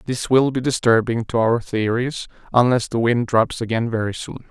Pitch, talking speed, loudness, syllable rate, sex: 120 Hz, 185 wpm, -19 LUFS, 4.8 syllables/s, male